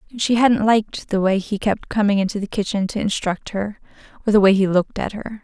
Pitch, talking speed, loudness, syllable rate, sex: 205 Hz, 245 wpm, -19 LUFS, 6.0 syllables/s, female